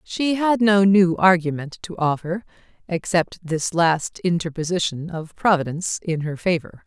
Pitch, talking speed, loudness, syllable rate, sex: 175 Hz, 130 wpm, -21 LUFS, 4.6 syllables/s, female